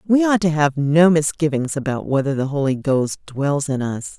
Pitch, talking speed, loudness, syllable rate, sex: 150 Hz, 200 wpm, -19 LUFS, 4.7 syllables/s, female